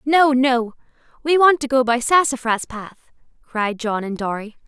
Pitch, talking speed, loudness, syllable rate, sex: 250 Hz, 165 wpm, -19 LUFS, 4.3 syllables/s, female